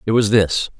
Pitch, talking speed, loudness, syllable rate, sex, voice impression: 105 Hz, 225 wpm, -16 LUFS, 4.8 syllables/s, male, masculine, very adult-like, thick, slightly sharp